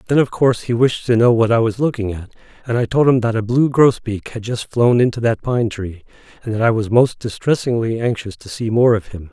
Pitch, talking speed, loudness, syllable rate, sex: 115 Hz, 250 wpm, -17 LUFS, 5.6 syllables/s, male